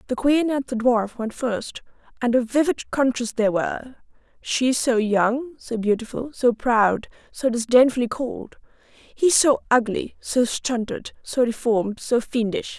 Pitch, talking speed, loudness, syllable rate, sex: 240 Hz, 145 wpm, -22 LUFS, 4.1 syllables/s, female